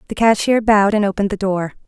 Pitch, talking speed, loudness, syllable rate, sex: 205 Hz, 225 wpm, -16 LUFS, 7.1 syllables/s, female